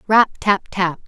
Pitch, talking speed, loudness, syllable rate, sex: 195 Hz, 165 wpm, -18 LUFS, 3.9 syllables/s, female